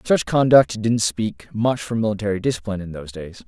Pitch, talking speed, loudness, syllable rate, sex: 105 Hz, 190 wpm, -20 LUFS, 5.7 syllables/s, male